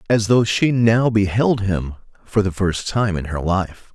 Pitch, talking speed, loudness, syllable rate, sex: 100 Hz, 200 wpm, -19 LUFS, 4.0 syllables/s, male